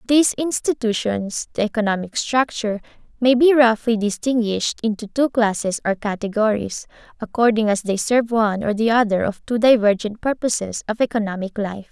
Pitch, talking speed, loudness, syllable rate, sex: 225 Hz, 135 wpm, -20 LUFS, 5.5 syllables/s, female